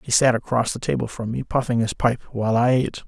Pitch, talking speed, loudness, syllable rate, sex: 120 Hz, 255 wpm, -22 LUFS, 6.4 syllables/s, male